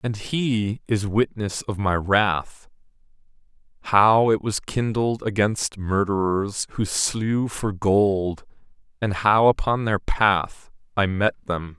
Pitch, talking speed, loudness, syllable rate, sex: 105 Hz, 125 wpm, -22 LUFS, 3.3 syllables/s, male